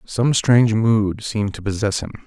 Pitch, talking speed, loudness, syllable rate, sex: 110 Hz, 185 wpm, -19 LUFS, 4.9 syllables/s, male